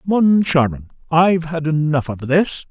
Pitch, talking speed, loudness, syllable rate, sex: 155 Hz, 135 wpm, -17 LUFS, 4.2 syllables/s, male